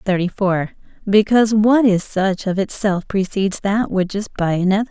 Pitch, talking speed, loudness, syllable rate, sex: 200 Hz, 170 wpm, -18 LUFS, 5.0 syllables/s, female